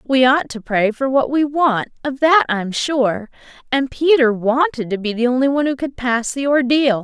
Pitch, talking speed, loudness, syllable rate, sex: 255 Hz, 205 wpm, -17 LUFS, 4.7 syllables/s, female